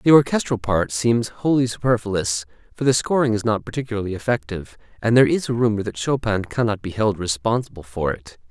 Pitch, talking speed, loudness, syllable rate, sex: 110 Hz, 185 wpm, -21 LUFS, 5.8 syllables/s, male